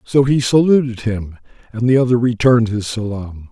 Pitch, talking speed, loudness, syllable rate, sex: 115 Hz, 170 wpm, -16 LUFS, 5.2 syllables/s, male